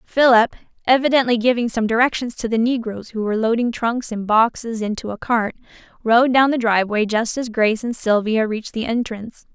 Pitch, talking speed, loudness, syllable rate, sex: 230 Hz, 180 wpm, -19 LUFS, 5.6 syllables/s, female